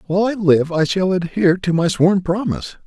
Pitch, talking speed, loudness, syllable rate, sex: 180 Hz, 210 wpm, -17 LUFS, 5.7 syllables/s, male